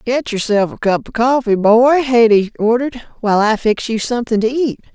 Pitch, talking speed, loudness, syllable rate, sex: 230 Hz, 195 wpm, -15 LUFS, 5.3 syllables/s, female